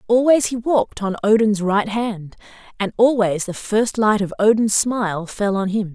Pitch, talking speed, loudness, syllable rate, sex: 210 Hz, 180 wpm, -18 LUFS, 4.6 syllables/s, female